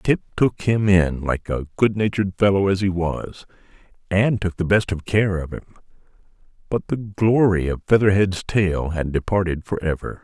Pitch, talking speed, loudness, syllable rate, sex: 95 Hz, 170 wpm, -20 LUFS, 4.9 syllables/s, male